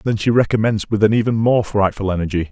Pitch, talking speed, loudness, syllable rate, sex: 105 Hz, 215 wpm, -17 LUFS, 6.8 syllables/s, male